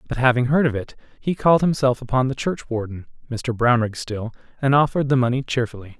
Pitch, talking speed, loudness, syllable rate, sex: 125 Hz, 170 wpm, -21 LUFS, 6.1 syllables/s, male